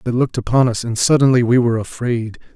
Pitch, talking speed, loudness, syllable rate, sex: 120 Hz, 235 wpm, -16 LUFS, 6.9 syllables/s, male